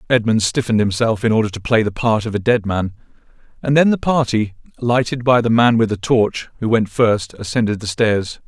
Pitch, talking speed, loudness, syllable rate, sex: 115 Hz, 210 wpm, -17 LUFS, 5.4 syllables/s, male